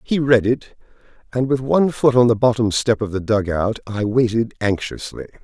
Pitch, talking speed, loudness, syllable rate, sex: 115 Hz, 190 wpm, -18 LUFS, 5.1 syllables/s, male